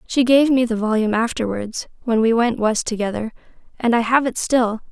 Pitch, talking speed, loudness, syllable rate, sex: 230 Hz, 195 wpm, -19 LUFS, 5.4 syllables/s, female